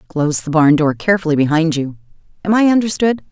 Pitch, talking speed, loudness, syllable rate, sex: 165 Hz, 165 wpm, -15 LUFS, 6.5 syllables/s, female